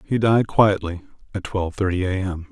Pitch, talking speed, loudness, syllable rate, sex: 95 Hz, 190 wpm, -21 LUFS, 5.5 syllables/s, male